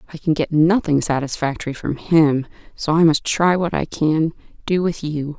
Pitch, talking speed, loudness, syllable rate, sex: 160 Hz, 190 wpm, -19 LUFS, 4.9 syllables/s, female